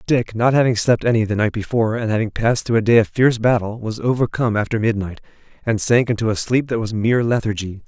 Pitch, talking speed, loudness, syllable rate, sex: 115 Hz, 230 wpm, -18 LUFS, 6.5 syllables/s, male